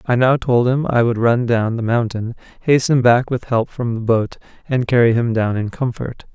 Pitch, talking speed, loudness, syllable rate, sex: 120 Hz, 220 wpm, -17 LUFS, 4.8 syllables/s, male